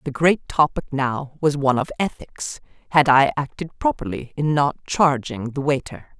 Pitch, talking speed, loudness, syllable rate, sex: 145 Hz, 165 wpm, -21 LUFS, 4.7 syllables/s, female